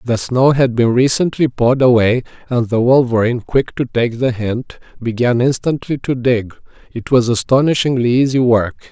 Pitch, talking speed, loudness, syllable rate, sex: 125 Hz, 160 wpm, -15 LUFS, 5.1 syllables/s, male